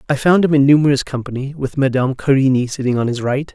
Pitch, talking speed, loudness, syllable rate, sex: 135 Hz, 220 wpm, -16 LUFS, 6.6 syllables/s, male